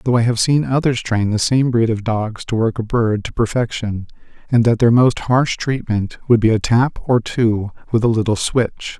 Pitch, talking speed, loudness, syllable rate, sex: 115 Hz, 220 wpm, -17 LUFS, 4.6 syllables/s, male